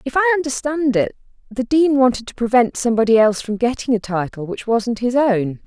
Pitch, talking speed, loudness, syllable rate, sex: 240 Hz, 200 wpm, -18 LUFS, 5.7 syllables/s, female